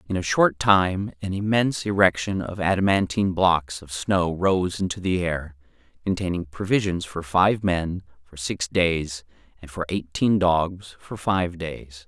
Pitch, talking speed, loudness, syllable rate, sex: 90 Hz, 155 wpm, -23 LUFS, 4.2 syllables/s, male